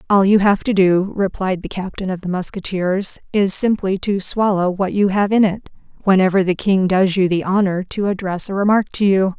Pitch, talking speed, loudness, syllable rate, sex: 190 Hz, 210 wpm, -17 LUFS, 5.1 syllables/s, female